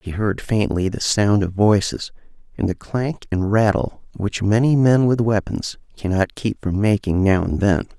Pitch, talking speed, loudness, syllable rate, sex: 105 Hz, 180 wpm, -19 LUFS, 4.4 syllables/s, male